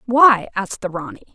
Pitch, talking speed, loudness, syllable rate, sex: 215 Hz, 180 wpm, -17 LUFS, 5.8 syllables/s, female